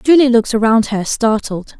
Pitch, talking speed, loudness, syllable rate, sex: 230 Hz, 165 wpm, -14 LUFS, 4.6 syllables/s, female